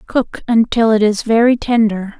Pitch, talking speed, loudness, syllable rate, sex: 225 Hz, 165 wpm, -14 LUFS, 4.5 syllables/s, female